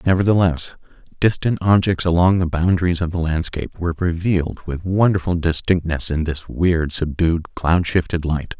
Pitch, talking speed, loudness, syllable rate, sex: 85 Hz, 145 wpm, -19 LUFS, 5.1 syllables/s, male